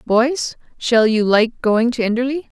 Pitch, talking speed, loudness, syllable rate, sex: 235 Hz, 160 wpm, -17 LUFS, 4.1 syllables/s, female